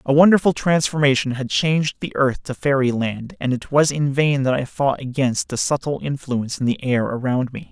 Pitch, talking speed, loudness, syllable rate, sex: 135 Hz, 210 wpm, -20 LUFS, 5.2 syllables/s, male